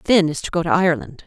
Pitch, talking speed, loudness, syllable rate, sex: 170 Hz, 285 wpm, -19 LUFS, 6.9 syllables/s, female